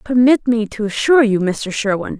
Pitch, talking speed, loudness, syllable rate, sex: 230 Hz, 190 wpm, -16 LUFS, 5.3 syllables/s, female